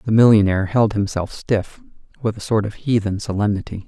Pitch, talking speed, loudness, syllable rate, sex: 105 Hz, 170 wpm, -19 LUFS, 5.5 syllables/s, male